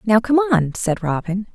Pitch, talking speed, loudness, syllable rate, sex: 210 Hz, 195 wpm, -19 LUFS, 4.8 syllables/s, female